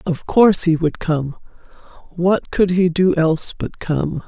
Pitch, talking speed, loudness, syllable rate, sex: 170 Hz, 170 wpm, -17 LUFS, 4.2 syllables/s, female